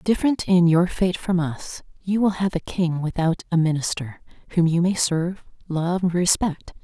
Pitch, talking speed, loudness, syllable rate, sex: 175 Hz, 175 wpm, -22 LUFS, 4.6 syllables/s, female